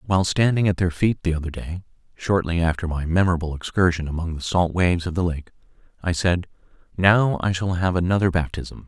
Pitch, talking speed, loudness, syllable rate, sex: 90 Hz, 190 wpm, -22 LUFS, 5.9 syllables/s, male